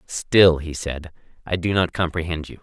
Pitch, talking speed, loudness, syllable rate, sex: 85 Hz, 185 wpm, -21 LUFS, 4.6 syllables/s, male